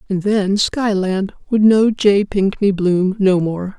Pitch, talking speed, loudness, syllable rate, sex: 200 Hz, 160 wpm, -16 LUFS, 3.5 syllables/s, female